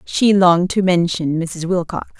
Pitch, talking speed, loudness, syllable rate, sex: 175 Hz, 165 wpm, -16 LUFS, 4.4 syllables/s, female